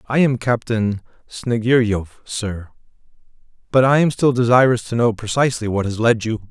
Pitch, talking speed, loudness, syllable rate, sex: 115 Hz, 155 wpm, -18 LUFS, 4.9 syllables/s, male